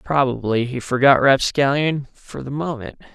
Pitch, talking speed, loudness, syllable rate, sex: 135 Hz, 135 wpm, -19 LUFS, 4.5 syllables/s, male